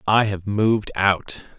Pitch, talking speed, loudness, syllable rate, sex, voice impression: 100 Hz, 150 wpm, -21 LUFS, 3.9 syllables/s, male, masculine, middle-aged, powerful, bright, raspy, friendly, unique, wild, lively, intense